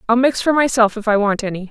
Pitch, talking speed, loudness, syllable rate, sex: 230 Hz, 280 wpm, -16 LUFS, 6.5 syllables/s, female